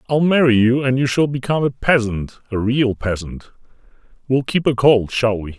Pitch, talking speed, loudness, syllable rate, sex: 120 Hz, 195 wpm, -17 LUFS, 5.3 syllables/s, male